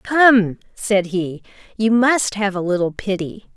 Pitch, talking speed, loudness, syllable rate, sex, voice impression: 205 Hz, 150 wpm, -18 LUFS, 3.7 syllables/s, female, feminine, adult-like, sincere, slightly calm, slightly elegant, slightly sweet